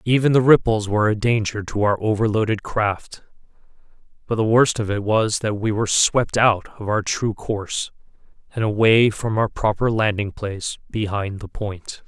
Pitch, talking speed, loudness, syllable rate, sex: 110 Hz, 175 wpm, -20 LUFS, 4.8 syllables/s, male